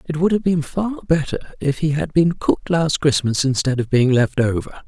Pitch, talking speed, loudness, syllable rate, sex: 150 Hz, 220 wpm, -19 LUFS, 5.0 syllables/s, male